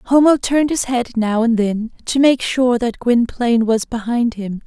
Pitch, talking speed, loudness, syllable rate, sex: 240 Hz, 195 wpm, -17 LUFS, 4.5 syllables/s, female